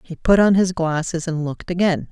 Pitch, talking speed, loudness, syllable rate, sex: 170 Hz, 225 wpm, -19 LUFS, 5.5 syllables/s, female